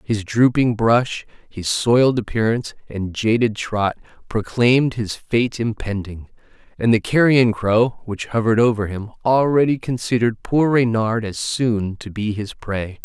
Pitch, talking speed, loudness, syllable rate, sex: 115 Hz, 145 wpm, -19 LUFS, 4.4 syllables/s, male